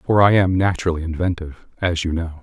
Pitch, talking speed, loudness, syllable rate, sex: 85 Hz, 200 wpm, -19 LUFS, 6.2 syllables/s, male